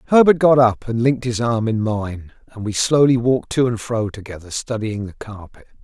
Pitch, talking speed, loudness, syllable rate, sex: 115 Hz, 205 wpm, -18 LUFS, 5.3 syllables/s, male